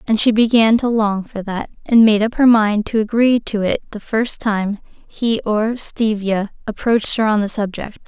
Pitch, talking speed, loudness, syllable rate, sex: 220 Hz, 200 wpm, -17 LUFS, 4.5 syllables/s, female